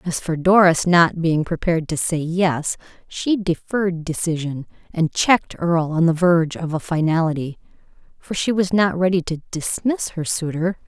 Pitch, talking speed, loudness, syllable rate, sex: 170 Hz, 165 wpm, -20 LUFS, 4.9 syllables/s, female